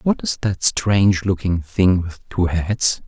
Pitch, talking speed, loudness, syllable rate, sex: 95 Hz, 175 wpm, -19 LUFS, 3.9 syllables/s, male